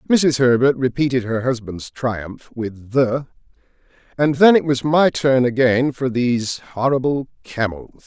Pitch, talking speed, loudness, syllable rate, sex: 130 Hz, 140 wpm, -18 LUFS, 4.1 syllables/s, male